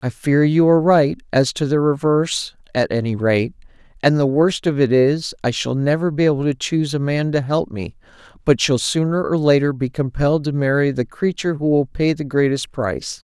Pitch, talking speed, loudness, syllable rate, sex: 140 Hz, 210 wpm, -18 LUFS, 5.3 syllables/s, male